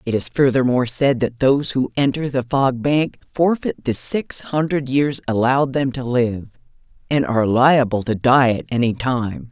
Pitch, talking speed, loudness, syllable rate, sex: 130 Hz, 175 wpm, -18 LUFS, 4.7 syllables/s, female